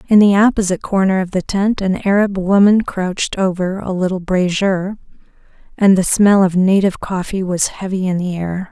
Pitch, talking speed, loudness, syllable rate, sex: 190 Hz, 180 wpm, -15 LUFS, 5.2 syllables/s, female